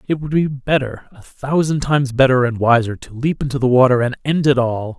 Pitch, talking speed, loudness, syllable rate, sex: 130 Hz, 230 wpm, -17 LUFS, 5.5 syllables/s, male